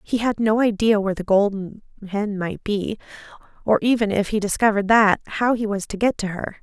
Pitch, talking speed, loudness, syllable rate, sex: 210 Hz, 210 wpm, -21 LUFS, 5.6 syllables/s, female